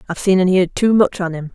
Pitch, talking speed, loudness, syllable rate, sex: 185 Hz, 310 wpm, -16 LUFS, 6.6 syllables/s, female